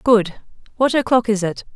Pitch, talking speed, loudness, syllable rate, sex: 220 Hz, 170 wpm, -18 LUFS, 4.9 syllables/s, female